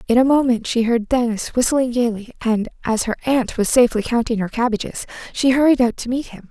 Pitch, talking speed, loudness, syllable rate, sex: 240 Hz, 210 wpm, -19 LUFS, 5.7 syllables/s, female